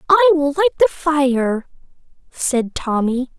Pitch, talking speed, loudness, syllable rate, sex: 290 Hz, 125 wpm, -17 LUFS, 3.6 syllables/s, female